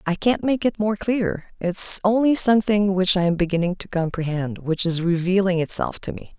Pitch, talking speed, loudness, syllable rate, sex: 190 Hz, 195 wpm, -20 LUFS, 5.1 syllables/s, female